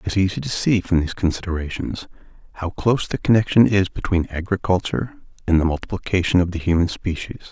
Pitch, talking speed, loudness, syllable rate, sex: 90 Hz, 175 wpm, -21 LUFS, 6.5 syllables/s, male